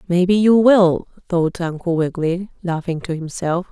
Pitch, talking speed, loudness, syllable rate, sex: 175 Hz, 145 wpm, -18 LUFS, 4.7 syllables/s, female